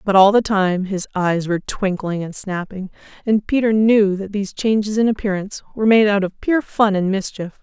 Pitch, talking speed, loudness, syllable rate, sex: 200 Hz, 205 wpm, -18 LUFS, 5.3 syllables/s, female